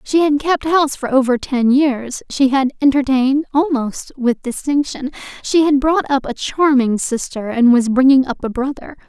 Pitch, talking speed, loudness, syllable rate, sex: 270 Hz, 180 wpm, -16 LUFS, 4.8 syllables/s, female